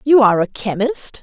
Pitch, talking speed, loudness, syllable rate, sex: 235 Hz, 195 wpm, -16 LUFS, 5.3 syllables/s, female